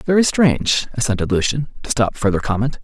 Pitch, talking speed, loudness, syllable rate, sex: 120 Hz, 170 wpm, -18 LUFS, 5.7 syllables/s, male